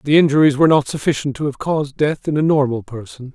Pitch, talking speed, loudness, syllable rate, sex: 140 Hz, 235 wpm, -17 LUFS, 6.5 syllables/s, male